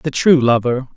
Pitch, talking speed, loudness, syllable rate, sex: 130 Hz, 190 wpm, -15 LUFS, 4.6 syllables/s, male